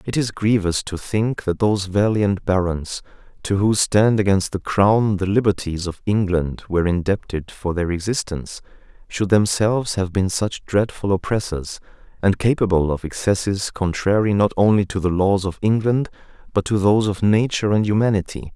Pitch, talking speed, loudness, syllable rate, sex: 100 Hz, 160 wpm, -20 LUFS, 5.1 syllables/s, male